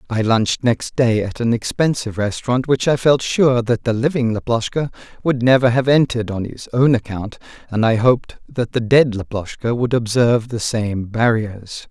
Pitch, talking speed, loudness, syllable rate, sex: 120 Hz, 180 wpm, -18 LUFS, 5.0 syllables/s, male